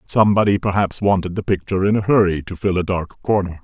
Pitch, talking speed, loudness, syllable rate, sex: 95 Hz, 215 wpm, -18 LUFS, 6.3 syllables/s, male